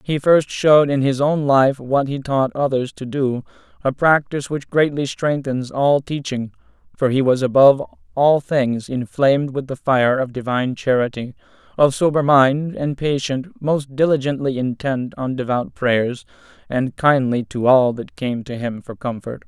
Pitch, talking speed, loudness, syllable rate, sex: 135 Hz, 165 wpm, -19 LUFS, 4.5 syllables/s, male